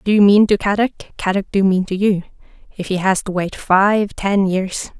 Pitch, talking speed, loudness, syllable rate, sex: 195 Hz, 205 wpm, -17 LUFS, 4.8 syllables/s, female